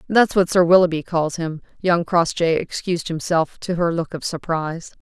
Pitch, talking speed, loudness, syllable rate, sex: 170 Hz, 180 wpm, -20 LUFS, 5.0 syllables/s, female